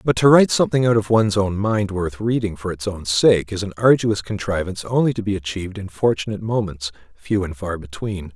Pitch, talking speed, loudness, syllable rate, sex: 100 Hz, 215 wpm, -20 LUFS, 5.9 syllables/s, male